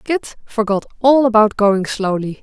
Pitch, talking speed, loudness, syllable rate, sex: 220 Hz, 150 wpm, -16 LUFS, 4.3 syllables/s, female